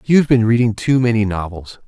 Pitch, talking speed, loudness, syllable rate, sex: 115 Hz, 190 wpm, -15 LUFS, 5.8 syllables/s, male